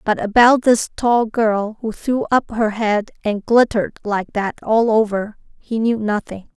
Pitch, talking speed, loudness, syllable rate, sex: 220 Hz, 175 wpm, -18 LUFS, 4.1 syllables/s, female